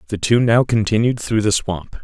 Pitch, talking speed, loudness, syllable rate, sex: 110 Hz, 205 wpm, -17 LUFS, 5.0 syllables/s, male